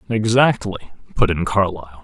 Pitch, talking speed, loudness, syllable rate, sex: 100 Hz, 120 wpm, -18 LUFS, 4.9 syllables/s, male